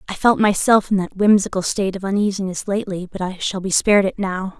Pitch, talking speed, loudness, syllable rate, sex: 195 Hz, 220 wpm, -19 LUFS, 6.2 syllables/s, female